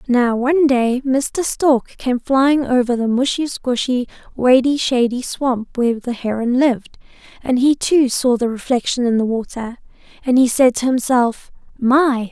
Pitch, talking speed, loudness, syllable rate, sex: 250 Hz, 160 wpm, -17 LUFS, 4.3 syllables/s, female